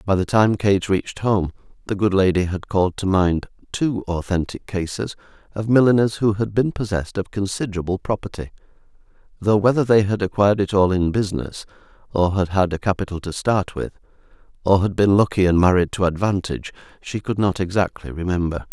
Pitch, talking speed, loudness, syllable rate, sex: 100 Hz, 175 wpm, -20 LUFS, 5.7 syllables/s, male